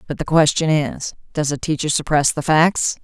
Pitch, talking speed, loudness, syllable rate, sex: 150 Hz, 200 wpm, -18 LUFS, 5.0 syllables/s, female